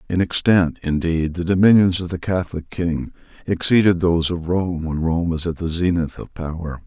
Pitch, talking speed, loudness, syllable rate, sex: 85 Hz, 185 wpm, -20 LUFS, 5.1 syllables/s, male